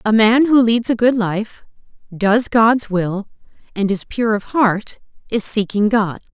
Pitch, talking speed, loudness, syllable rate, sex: 215 Hz, 170 wpm, -17 LUFS, 3.9 syllables/s, female